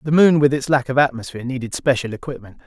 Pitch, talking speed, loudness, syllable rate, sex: 135 Hz, 225 wpm, -18 LUFS, 6.9 syllables/s, male